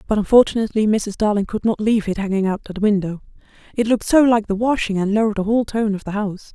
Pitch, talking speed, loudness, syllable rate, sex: 210 Hz, 250 wpm, -19 LUFS, 7.3 syllables/s, female